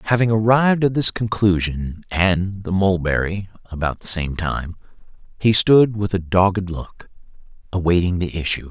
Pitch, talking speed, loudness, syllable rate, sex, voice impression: 95 Hz, 145 wpm, -19 LUFS, 4.6 syllables/s, male, very masculine, very middle-aged, slightly tensed, slightly powerful, bright, soft, muffled, slightly halting, raspy, cool, very intellectual, refreshing, sincere, very calm, mature, very friendly, reassuring, very unique, elegant, very wild, sweet, lively, kind, slightly intense